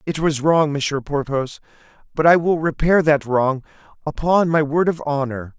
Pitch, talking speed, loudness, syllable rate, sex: 150 Hz, 170 wpm, -18 LUFS, 4.7 syllables/s, male